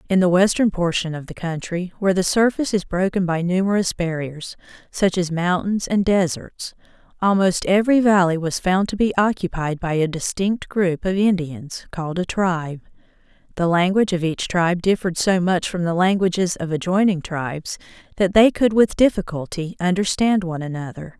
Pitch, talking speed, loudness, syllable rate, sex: 180 Hz, 165 wpm, -20 LUFS, 5.3 syllables/s, female